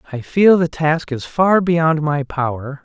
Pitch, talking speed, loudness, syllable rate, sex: 155 Hz, 190 wpm, -16 LUFS, 3.9 syllables/s, male